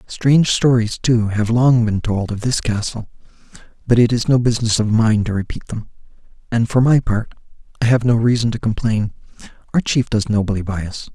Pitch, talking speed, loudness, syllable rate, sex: 115 Hz, 195 wpm, -17 LUFS, 5.3 syllables/s, male